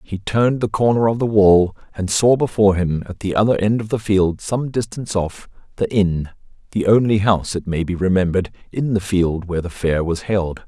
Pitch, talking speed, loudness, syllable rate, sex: 100 Hz, 210 wpm, -18 LUFS, 5.5 syllables/s, male